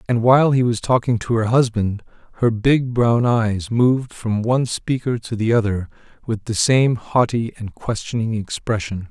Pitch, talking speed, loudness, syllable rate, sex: 115 Hz, 170 wpm, -19 LUFS, 4.7 syllables/s, male